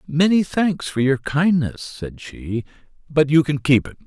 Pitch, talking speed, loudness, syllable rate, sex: 145 Hz, 175 wpm, -19 LUFS, 4.1 syllables/s, male